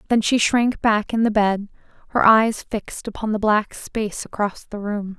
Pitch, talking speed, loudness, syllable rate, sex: 215 Hz, 195 wpm, -20 LUFS, 4.7 syllables/s, female